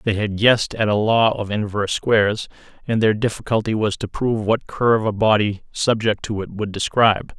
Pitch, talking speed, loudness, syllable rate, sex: 105 Hz, 195 wpm, -19 LUFS, 5.4 syllables/s, male